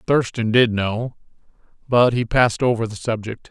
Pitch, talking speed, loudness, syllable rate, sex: 115 Hz, 155 wpm, -19 LUFS, 4.8 syllables/s, male